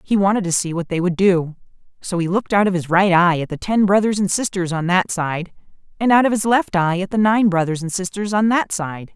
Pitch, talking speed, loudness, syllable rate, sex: 190 Hz, 260 wpm, -18 LUFS, 5.6 syllables/s, female